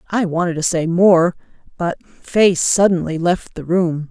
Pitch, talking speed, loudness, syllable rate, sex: 175 Hz, 160 wpm, -17 LUFS, 4.1 syllables/s, female